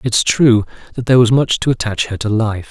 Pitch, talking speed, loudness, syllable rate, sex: 110 Hz, 265 wpm, -14 LUFS, 6.1 syllables/s, male